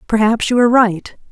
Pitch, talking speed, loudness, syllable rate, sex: 225 Hz, 185 wpm, -14 LUFS, 5.7 syllables/s, female